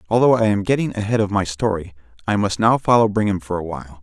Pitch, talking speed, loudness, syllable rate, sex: 105 Hz, 240 wpm, -19 LUFS, 6.6 syllables/s, male